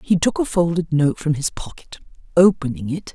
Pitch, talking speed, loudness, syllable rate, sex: 165 Hz, 190 wpm, -19 LUFS, 5.2 syllables/s, female